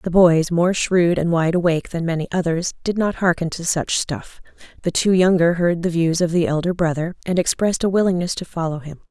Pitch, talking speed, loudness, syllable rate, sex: 170 Hz, 215 wpm, -19 LUFS, 5.6 syllables/s, female